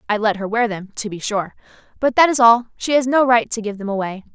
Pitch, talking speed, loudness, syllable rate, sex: 225 Hz, 275 wpm, -18 LUFS, 6.0 syllables/s, female